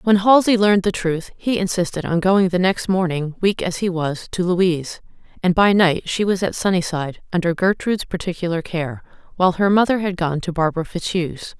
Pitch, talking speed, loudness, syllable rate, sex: 180 Hz, 190 wpm, -19 LUFS, 5.4 syllables/s, female